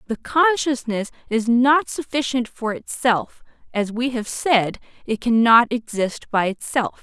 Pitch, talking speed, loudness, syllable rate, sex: 240 Hz, 135 wpm, -20 LUFS, 3.9 syllables/s, female